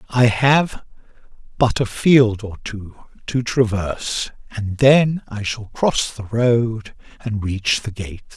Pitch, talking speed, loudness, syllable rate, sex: 115 Hz, 145 wpm, -19 LUFS, 3.5 syllables/s, male